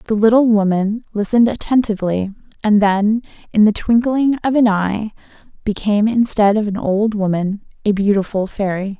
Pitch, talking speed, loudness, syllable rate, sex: 210 Hz, 145 wpm, -16 LUFS, 5.0 syllables/s, female